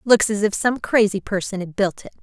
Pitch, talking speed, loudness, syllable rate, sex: 205 Hz, 240 wpm, -20 LUFS, 5.4 syllables/s, female